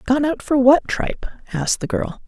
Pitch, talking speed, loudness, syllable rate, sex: 270 Hz, 210 wpm, -19 LUFS, 5.3 syllables/s, female